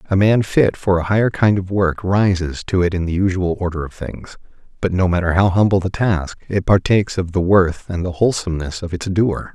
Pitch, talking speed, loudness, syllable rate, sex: 95 Hz, 220 wpm, -18 LUFS, 5.4 syllables/s, male